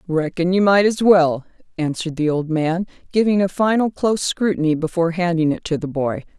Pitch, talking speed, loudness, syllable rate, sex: 175 Hz, 190 wpm, -19 LUFS, 5.6 syllables/s, female